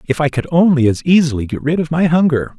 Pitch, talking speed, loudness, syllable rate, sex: 150 Hz, 255 wpm, -14 LUFS, 6.3 syllables/s, male